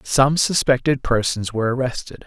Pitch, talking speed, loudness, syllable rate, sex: 130 Hz, 135 wpm, -19 LUFS, 5.1 syllables/s, male